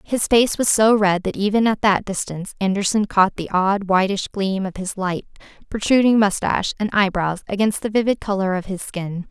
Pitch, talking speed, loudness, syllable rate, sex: 200 Hz, 195 wpm, -19 LUFS, 5.2 syllables/s, female